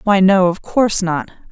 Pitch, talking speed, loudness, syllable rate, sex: 190 Hz, 200 wpm, -15 LUFS, 5.0 syllables/s, female